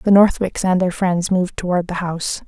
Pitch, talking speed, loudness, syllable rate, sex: 180 Hz, 220 wpm, -18 LUFS, 5.4 syllables/s, female